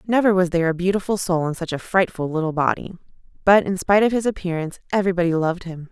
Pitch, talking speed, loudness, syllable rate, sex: 180 Hz, 215 wpm, -20 LUFS, 7.2 syllables/s, female